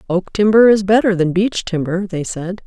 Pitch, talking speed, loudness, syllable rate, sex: 190 Hz, 200 wpm, -15 LUFS, 4.8 syllables/s, female